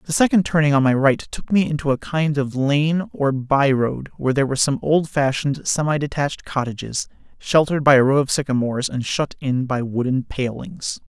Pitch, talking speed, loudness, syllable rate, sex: 140 Hz, 195 wpm, -20 LUFS, 5.5 syllables/s, male